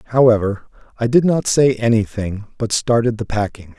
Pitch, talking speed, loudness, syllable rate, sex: 115 Hz, 160 wpm, -17 LUFS, 5.3 syllables/s, male